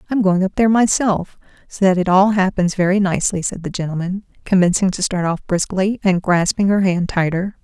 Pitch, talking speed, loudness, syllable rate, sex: 190 Hz, 195 wpm, -17 LUFS, 5.5 syllables/s, female